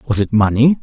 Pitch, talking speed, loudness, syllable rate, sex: 120 Hz, 215 wpm, -14 LUFS, 5.1 syllables/s, male